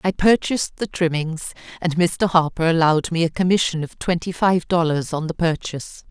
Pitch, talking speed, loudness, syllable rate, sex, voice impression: 170 Hz, 175 wpm, -20 LUFS, 5.3 syllables/s, female, very feminine, very adult-like, intellectual, slightly calm, elegant